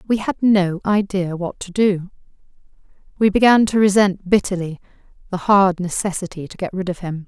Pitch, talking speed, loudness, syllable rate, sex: 190 Hz, 165 wpm, -18 LUFS, 5.1 syllables/s, female